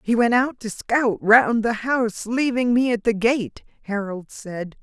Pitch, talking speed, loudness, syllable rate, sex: 225 Hz, 185 wpm, -21 LUFS, 4.0 syllables/s, female